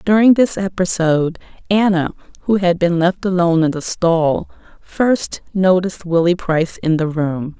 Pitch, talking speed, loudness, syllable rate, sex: 175 Hz, 150 wpm, -16 LUFS, 4.7 syllables/s, female